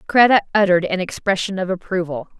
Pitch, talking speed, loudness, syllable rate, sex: 185 Hz, 150 wpm, -18 LUFS, 6.5 syllables/s, female